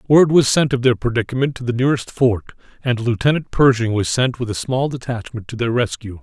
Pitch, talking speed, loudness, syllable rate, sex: 120 Hz, 210 wpm, -18 LUFS, 5.7 syllables/s, male